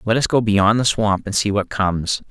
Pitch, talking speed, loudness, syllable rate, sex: 105 Hz, 260 wpm, -18 LUFS, 5.2 syllables/s, male